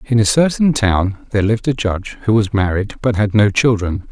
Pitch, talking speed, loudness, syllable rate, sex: 110 Hz, 220 wpm, -16 LUFS, 5.4 syllables/s, male